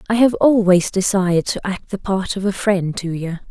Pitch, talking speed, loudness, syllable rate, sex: 190 Hz, 225 wpm, -18 LUFS, 5.0 syllables/s, female